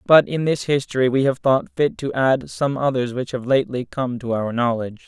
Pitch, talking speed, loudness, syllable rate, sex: 130 Hz, 225 wpm, -20 LUFS, 5.4 syllables/s, male